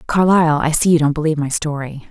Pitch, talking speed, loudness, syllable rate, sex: 155 Hz, 230 wpm, -16 LUFS, 6.6 syllables/s, female